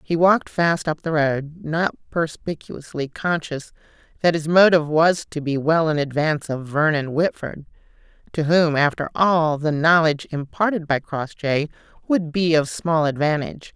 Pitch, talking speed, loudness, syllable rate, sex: 155 Hz, 155 wpm, -20 LUFS, 4.6 syllables/s, female